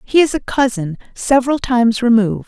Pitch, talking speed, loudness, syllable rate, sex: 240 Hz, 170 wpm, -15 LUFS, 5.8 syllables/s, female